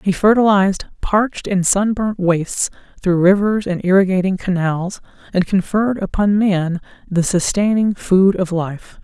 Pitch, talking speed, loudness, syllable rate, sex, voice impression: 190 Hz, 135 wpm, -17 LUFS, 4.5 syllables/s, female, feminine, gender-neutral, very adult-like, very middle-aged, slightly thin, slightly relaxed, slightly weak, slightly bright, very soft, muffled, slightly halting, slightly cool, very intellectual, very sincere, very calm, slightly mature, friendly, very reassuring, very unique, very elegant, slightly wild, slightly lively, very kind, slightly light